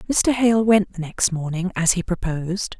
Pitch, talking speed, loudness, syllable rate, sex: 190 Hz, 195 wpm, -20 LUFS, 4.7 syllables/s, female